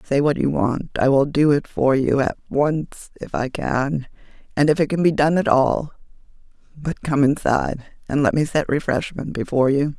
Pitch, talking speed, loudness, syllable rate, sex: 145 Hz, 200 wpm, -20 LUFS, 5.1 syllables/s, female